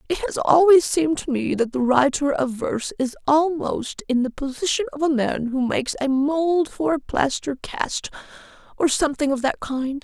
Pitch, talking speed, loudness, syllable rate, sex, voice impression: 295 Hz, 190 wpm, -21 LUFS, 4.9 syllables/s, female, feminine, slightly adult-like, slightly powerful, slightly fluent, slightly sincere